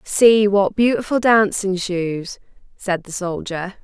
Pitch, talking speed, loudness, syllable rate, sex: 195 Hz, 125 wpm, -18 LUFS, 3.6 syllables/s, female